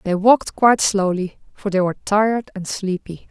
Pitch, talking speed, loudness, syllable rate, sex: 200 Hz, 180 wpm, -19 LUFS, 5.3 syllables/s, female